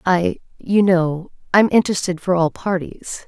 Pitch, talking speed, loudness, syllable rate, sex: 180 Hz, 110 wpm, -18 LUFS, 4.4 syllables/s, female